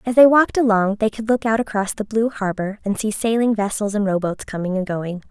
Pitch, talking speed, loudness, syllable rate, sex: 210 Hz, 240 wpm, -19 LUFS, 5.7 syllables/s, female